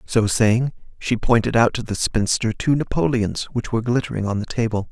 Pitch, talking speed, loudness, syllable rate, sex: 115 Hz, 195 wpm, -21 LUFS, 5.4 syllables/s, male